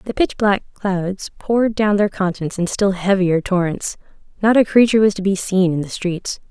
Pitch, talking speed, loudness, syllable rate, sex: 195 Hz, 205 wpm, -18 LUFS, 5.0 syllables/s, female